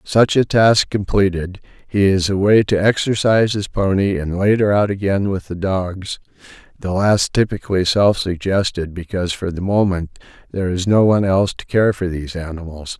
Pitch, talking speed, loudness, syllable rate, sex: 95 Hz, 170 wpm, -17 LUFS, 5.2 syllables/s, male